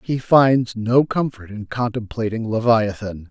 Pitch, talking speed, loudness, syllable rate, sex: 115 Hz, 125 wpm, -19 LUFS, 4.1 syllables/s, male